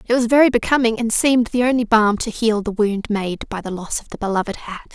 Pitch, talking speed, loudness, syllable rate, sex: 220 Hz, 255 wpm, -18 LUFS, 5.9 syllables/s, female